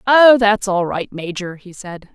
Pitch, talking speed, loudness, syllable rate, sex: 200 Hz, 195 wpm, -15 LUFS, 4.0 syllables/s, female